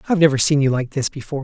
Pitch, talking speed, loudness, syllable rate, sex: 140 Hz, 290 wpm, -18 LUFS, 8.5 syllables/s, male